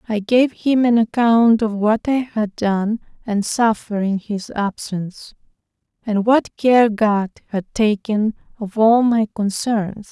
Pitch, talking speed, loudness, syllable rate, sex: 220 Hz, 150 wpm, -18 LUFS, 3.8 syllables/s, female